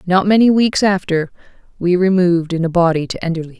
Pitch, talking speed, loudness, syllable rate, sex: 180 Hz, 185 wpm, -15 LUFS, 6.0 syllables/s, female